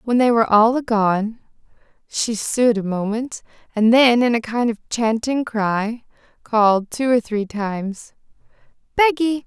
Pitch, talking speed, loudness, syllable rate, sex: 230 Hz, 145 wpm, -19 LUFS, 4.0 syllables/s, female